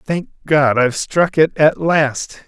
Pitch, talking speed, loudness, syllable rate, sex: 150 Hz, 170 wpm, -15 LUFS, 3.7 syllables/s, male